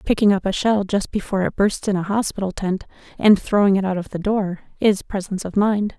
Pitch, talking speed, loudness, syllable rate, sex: 200 Hz, 230 wpm, -20 LUFS, 5.8 syllables/s, female